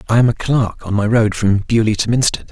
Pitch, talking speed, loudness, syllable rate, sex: 110 Hz, 265 wpm, -16 LUFS, 5.6 syllables/s, male